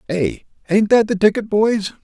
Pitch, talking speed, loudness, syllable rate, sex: 200 Hz, 175 wpm, -17 LUFS, 4.8 syllables/s, male